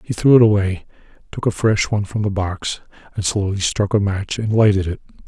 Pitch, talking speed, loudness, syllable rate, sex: 100 Hz, 215 wpm, -18 LUFS, 5.5 syllables/s, male